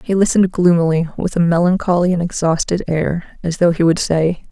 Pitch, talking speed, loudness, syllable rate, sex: 175 Hz, 185 wpm, -16 LUFS, 5.5 syllables/s, female